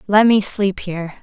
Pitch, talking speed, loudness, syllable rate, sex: 195 Hz, 195 wpm, -17 LUFS, 4.9 syllables/s, female